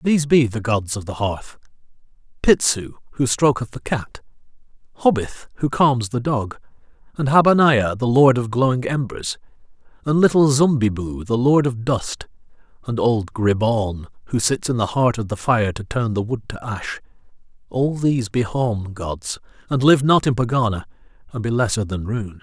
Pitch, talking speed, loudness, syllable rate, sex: 120 Hz, 165 wpm, -20 LUFS, 4.7 syllables/s, male